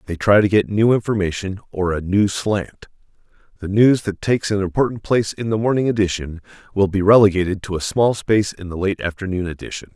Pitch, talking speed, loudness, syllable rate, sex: 100 Hz, 200 wpm, -19 LUFS, 5.9 syllables/s, male